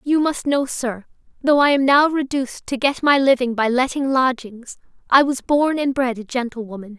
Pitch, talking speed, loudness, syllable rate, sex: 260 Hz, 200 wpm, -18 LUFS, 5.0 syllables/s, female